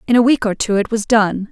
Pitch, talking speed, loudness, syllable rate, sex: 220 Hz, 315 wpm, -16 LUFS, 5.9 syllables/s, female